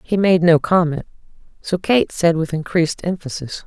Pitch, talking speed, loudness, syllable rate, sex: 170 Hz, 165 wpm, -18 LUFS, 4.9 syllables/s, female